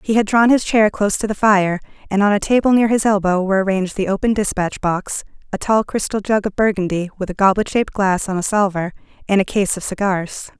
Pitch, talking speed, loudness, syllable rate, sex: 200 Hz, 230 wpm, -17 LUFS, 5.9 syllables/s, female